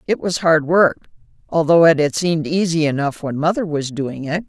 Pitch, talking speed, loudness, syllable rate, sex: 160 Hz, 200 wpm, -17 LUFS, 5.3 syllables/s, female